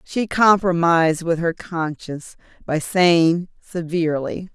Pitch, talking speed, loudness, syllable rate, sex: 170 Hz, 105 wpm, -19 LUFS, 4.1 syllables/s, female